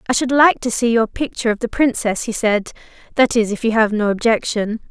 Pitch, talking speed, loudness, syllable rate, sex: 230 Hz, 220 wpm, -17 LUFS, 5.7 syllables/s, female